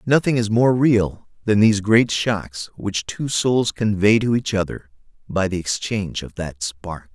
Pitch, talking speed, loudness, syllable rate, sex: 105 Hz, 175 wpm, -20 LUFS, 4.2 syllables/s, male